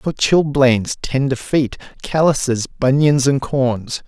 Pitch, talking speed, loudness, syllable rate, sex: 135 Hz, 120 wpm, -17 LUFS, 3.6 syllables/s, male